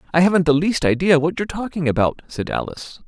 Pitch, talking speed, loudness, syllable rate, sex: 160 Hz, 215 wpm, -19 LUFS, 6.6 syllables/s, male